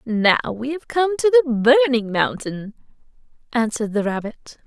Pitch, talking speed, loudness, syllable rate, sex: 245 Hz, 140 wpm, -19 LUFS, 4.9 syllables/s, female